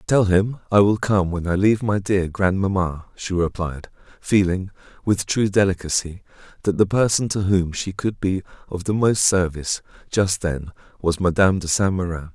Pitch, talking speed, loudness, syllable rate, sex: 95 Hz, 175 wpm, -21 LUFS, 4.9 syllables/s, male